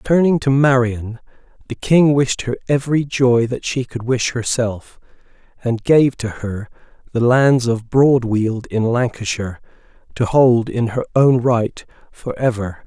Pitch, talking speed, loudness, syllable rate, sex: 125 Hz, 150 wpm, -17 LUFS, 4.1 syllables/s, male